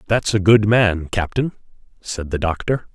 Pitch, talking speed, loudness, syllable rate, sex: 100 Hz, 165 wpm, -19 LUFS, 4.5 syllables/s, male